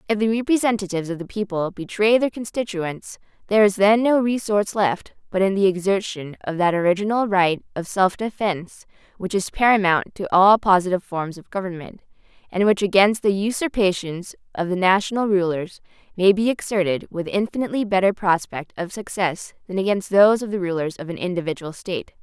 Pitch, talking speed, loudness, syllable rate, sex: 195 Hz, 170 wpm, -21 LUFS, 5.7 syllables/s, female